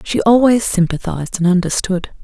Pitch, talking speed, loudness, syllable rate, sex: 195 Hz, 135 wpm, -15 LUFS, 5.3 syllables/s, female